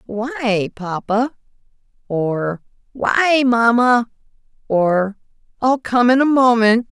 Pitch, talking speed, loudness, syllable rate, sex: 230 Hz, 95 wpm, -17 LUFS, 3.0 syllables/s, female